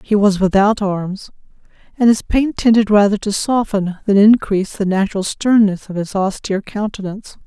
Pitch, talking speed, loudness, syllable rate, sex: 205 Hz, 160 wpm, -16 LUFS, 5.2 syllables/s, female